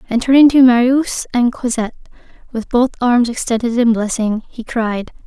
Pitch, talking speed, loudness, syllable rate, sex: 240 Hz, 160 wpm, -15 LUFS, 5.0 syllables/s, female